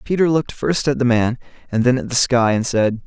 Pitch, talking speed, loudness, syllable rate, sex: 125 Hz, 255 wpm, -18 LUFS, 5.7 syllables/s, male